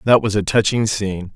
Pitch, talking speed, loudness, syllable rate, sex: 105 Hz, 220 wpm, -18 LUFS, 5.7 syllables/s, male